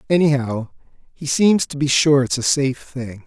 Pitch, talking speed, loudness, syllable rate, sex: 140 Hz, 185 wpm, -18 LUFS, 4.9 syllables/s, male